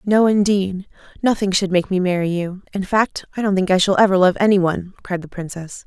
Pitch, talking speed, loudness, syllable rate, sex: 190 Hz, 215 wpm, -18 LUFS, 5.5 syllables/s, female